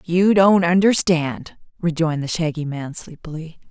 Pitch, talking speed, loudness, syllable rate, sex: 165 Hz, 130 wpm, -18 LUFS, 4.5 syllables/s, female